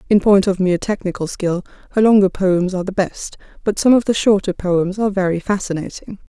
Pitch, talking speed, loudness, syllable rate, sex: 190 Hz, 200 wpm, -17 LUFS, 5.9 syllables/s, female